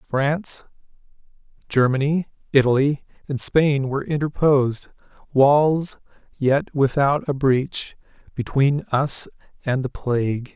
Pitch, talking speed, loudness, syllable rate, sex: 140 Hz, 95 wpm, -21 LUFS, 3.9 syllables/s, male